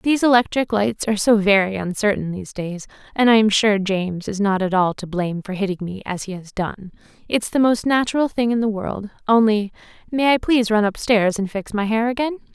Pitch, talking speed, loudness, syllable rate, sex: 210 Hz, 220 wpm, -19 LUFS, 5.7 syllables/s, female